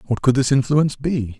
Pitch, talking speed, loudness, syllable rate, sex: 135 Hz, 215 wpm, -19 LUFS, 5.8 syllables/s, male